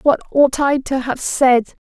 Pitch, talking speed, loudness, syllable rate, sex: 265 Hz, 190 wpm, -16 LUFS, 3.9 syllables/s, female